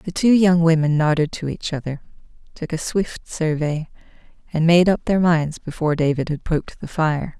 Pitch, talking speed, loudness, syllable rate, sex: 160 Hz, 185 wpm, -20 LUFS, 5.0 syllables/s, female